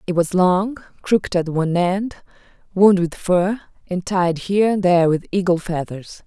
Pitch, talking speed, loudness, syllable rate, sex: 185 Hz, 170 wpm, -19 LUFS, 4.7 syllables/s, female